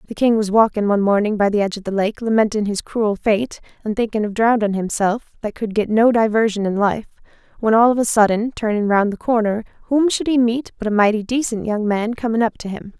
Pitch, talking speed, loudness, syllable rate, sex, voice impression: 215 Hz, 235 wpm, -18 LUFS, 5.9 syllables/s, female, very feminine, young, slightly adult-like, very thin, tensed, slightly weak, bright, slightly hard, clear, fluent, cute, slightly cool, very intellectual, refreshing, very sincere, slightly calm, friendly, very reassuring, slightly unique, elegant, slightly wild, sweet, lively, slightly strict, slightly intense